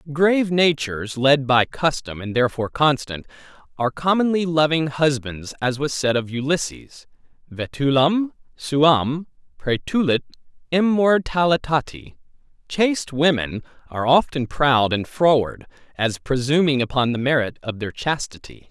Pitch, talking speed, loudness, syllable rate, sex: 140 Hz, 115 wpm, -20 LUFS, 4.7 syllables/s, male